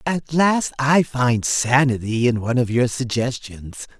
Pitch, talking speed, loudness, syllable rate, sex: 130 Hz, 150 wpm, -19 LUFS, 4.0 syllables/s, male